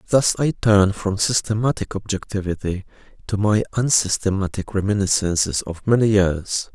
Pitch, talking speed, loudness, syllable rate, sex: 100 Hz, 115 wpm, -20 LUFS, 4.9 syllables/s, male